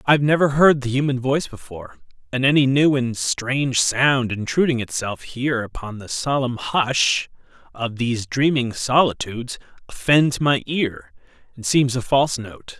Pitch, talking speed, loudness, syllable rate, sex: 130 Hz, 155 wpm, -20 LUFS, 4.8 syllables/s, male